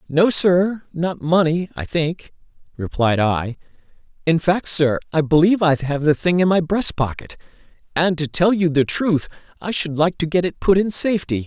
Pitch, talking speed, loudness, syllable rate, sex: 165 Hz, 190 wpm, -19 LUFS, 4.8 syllables/s, male